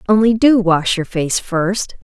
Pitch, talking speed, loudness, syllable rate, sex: 195 Hz, 170 wpm, -15 LUFS, 3.8 syllables/s, female